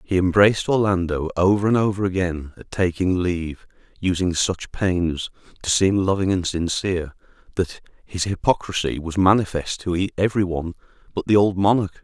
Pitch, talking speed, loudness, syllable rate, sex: 95 Hz, 150 wpm, -21 LUFS, 5.3 syllables/s, male